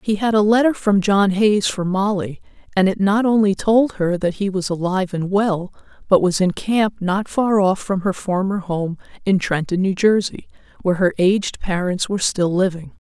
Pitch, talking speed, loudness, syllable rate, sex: 195 Hz, 195 wpm, -18 LUFS, 4.9 syllables/s, female